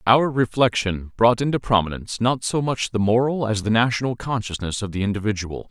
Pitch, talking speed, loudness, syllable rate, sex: 115 Hz, 180 wpm, -21 LUFS, 5.6 syllables/s, male